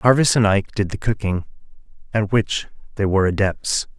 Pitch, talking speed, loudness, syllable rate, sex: 105 Hz, 165 wpm, -20 LUFS, 5.5 syllables/s, male